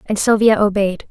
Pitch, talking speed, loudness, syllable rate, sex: 205 Hz, 165 wpm, -15 LUFS, 5.0 syllables/s, female